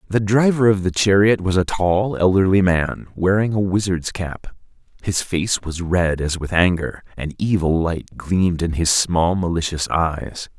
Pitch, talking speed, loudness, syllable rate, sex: 90 Hz, 170 wpm, -19 LUFS, 4.3 syllables/s, male